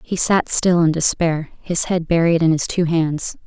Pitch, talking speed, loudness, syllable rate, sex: 165 Hz, 210 wpm, -17 LUFS, 4.4 syllables/s, female